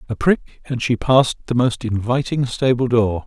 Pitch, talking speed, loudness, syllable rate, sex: 120 Hz, 185 wpm, -19 LUFS, 4.8 syllables/s, male